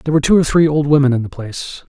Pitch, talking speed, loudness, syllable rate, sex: 145 Hz, 305 wpm, -15 LUFS, 8.0 syllables/s, male